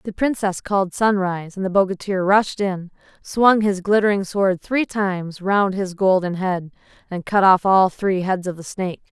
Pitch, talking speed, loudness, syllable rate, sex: 190 Hz, 185 wpm, -19 LUFS, 4.7 syllables/s, female